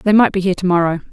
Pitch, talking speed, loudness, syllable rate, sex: 185 Hz, 320 wpm, -15 LUFS, 8.0 syllables/s, female